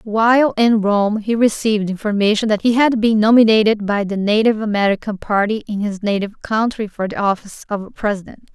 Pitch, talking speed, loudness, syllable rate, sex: 215 Hz, 175 wpm, -17 LUFS, 5.7 syllables/s, female